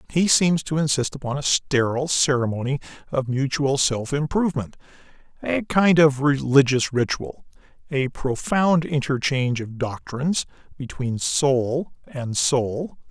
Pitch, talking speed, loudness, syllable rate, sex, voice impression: 135 Hz, 120 wpm, -22 LUFS, 4.3 syllables/s, male, very masculine, slightly old, very thick, tensed, slightly powerful, bright, soft, muffled, fluent, slightly raspy, cool, intellectual, slightly refreshing, sincere, calm, very mature, friendly, reassuring, very unique, slightly elegant, very wild, slightly sweet, lively, kind, slightly modest